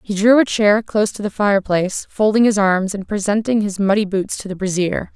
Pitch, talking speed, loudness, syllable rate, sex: 200 Hz, 220 wpm, -17 LUFS, 5.6 syllables/s, female